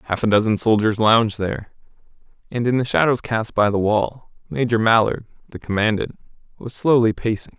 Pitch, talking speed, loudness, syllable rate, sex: 110 Hz, 165 wpm, -19 LUFS, 5.5 syllables/s, male